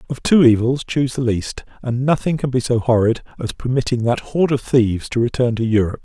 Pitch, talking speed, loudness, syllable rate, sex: 125 Hz, 220 wpm, -18 LUFS, 6.1 syllables/s, male